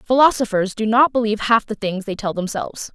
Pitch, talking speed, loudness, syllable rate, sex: 220 Hz, 205 wpm, -19 LUFS, 6.0 syllables/s, female